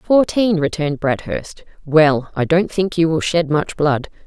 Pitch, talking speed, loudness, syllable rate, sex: 165 Hz, 170 wpm, -17 LUFS, 4.2 syllables/s, female